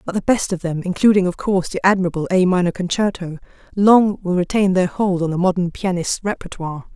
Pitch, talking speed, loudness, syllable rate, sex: 185 Hz, 200 wpm, -18 LUFS, 6.0 syllables/s, female